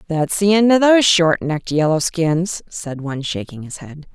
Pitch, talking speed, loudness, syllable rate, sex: 170 Hz, 190 wpm, -17 LUFS, 5.0 syllables/s, female